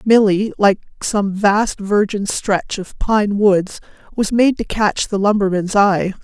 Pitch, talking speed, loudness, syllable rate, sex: 205 Hz, 155 wpm, -16 LUFS, 3.7 syllables/s, female